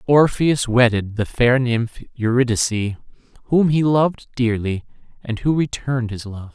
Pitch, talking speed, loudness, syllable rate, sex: 125 Hz, 135 wpm, -19 LUFS, 4.5 syllables/s, male